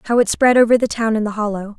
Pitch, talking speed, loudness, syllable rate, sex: 220 Hz, 305 wpm, -16 LUFS, 6.9 syllables/s, female